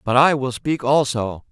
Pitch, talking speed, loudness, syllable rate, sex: 130 Hz, 200 wpm, -19 LUFS, 4.4 syllables/s, male